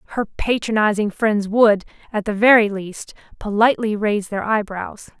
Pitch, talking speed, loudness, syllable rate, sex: 210 Hz, 140 wpm, -18 LUFS, 4.6 syllables/s, female